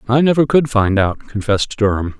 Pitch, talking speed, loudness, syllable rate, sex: 115 Hz, 190 wpm, -16 LUFS, 5.5 syllables/s, male